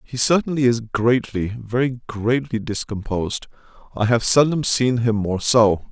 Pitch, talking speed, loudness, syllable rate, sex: 120 Hz, 140 wpm, -20 LUFS, 4.5 syllables/s, male